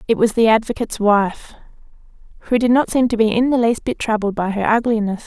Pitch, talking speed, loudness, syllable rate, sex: 220 Hz, 215 wpm, -17 LUFS, 6.0 syllables/s, female